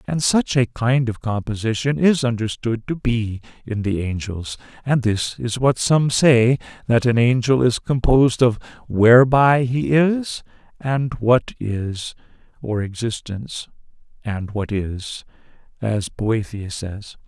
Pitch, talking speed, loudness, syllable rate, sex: 120 Hz, 135 wpm, -19 LUFS, 3.9 syllables/s, male